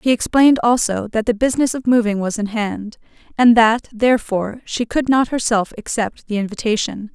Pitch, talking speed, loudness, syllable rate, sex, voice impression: 225 Hz, 175 wpm, -17 LUFS, 5.3 syllables/s, female, feminine, adult-like, slightly refreshing, slightly calm, friendly, slightly sweet